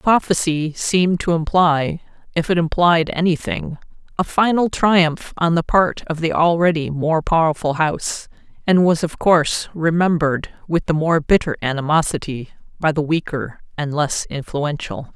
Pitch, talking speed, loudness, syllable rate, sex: 160 Hz, 140 wpm, -18 LUFS, 4.7 syllables/s, female